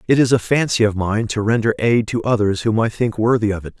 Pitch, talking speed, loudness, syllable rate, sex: 110 Hz, 270 wpm, -18 LUFS, 5.9 syllables/s, male